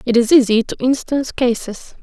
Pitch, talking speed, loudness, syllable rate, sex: 245 Hz, 180 wpm, -16 LUFS, 5.4 syllables/s, female